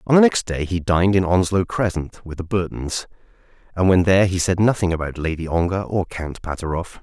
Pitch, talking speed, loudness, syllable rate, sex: 90 Hz, 205 wpm, -20 LUFS, 5.6 syllables/s, male